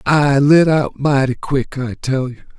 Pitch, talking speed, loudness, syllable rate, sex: 140 Hz, 185 wpm, -16 LUFS, 4.0 syllables/s, male